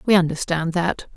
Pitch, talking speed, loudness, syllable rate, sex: 170 Hz, 155 wpm, -21 LUFS, 5.1 syllables/s, female